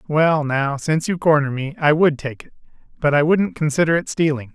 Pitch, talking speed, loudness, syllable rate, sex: 150 Hz, 200 wpm, -18 LUFS, 5.4 syllables/s, male